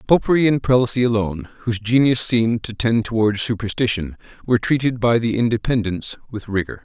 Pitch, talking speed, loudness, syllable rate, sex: 115 Hz, 160 wpm, -19 LUFS, 6.1 syllables/s, male